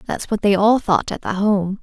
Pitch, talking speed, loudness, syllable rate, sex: 200 Hz, 265 wpm, -18 LUFS, 4.8 syllables/s, female